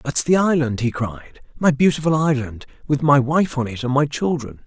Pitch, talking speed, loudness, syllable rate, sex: 140 Hz, 205 wpm, -19 LUFS, 5.0 syllables/s, male